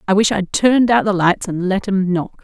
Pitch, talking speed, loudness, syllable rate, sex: 195 Hz, 270 wpm, -16 LUFS, 5.3 syllables/s, female